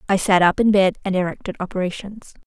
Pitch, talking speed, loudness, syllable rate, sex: 190 Hz, 195 wpm, -19 LUFS, 6.3 syllables/s, female